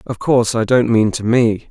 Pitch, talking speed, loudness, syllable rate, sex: 115 Hz, 245 wpm, -15 LUFS, 5.0 syllables/s, male